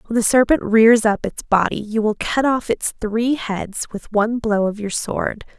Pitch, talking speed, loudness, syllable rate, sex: 220 Hz, 215 wpm, -19 LUFS, 4.5 syllables/s, female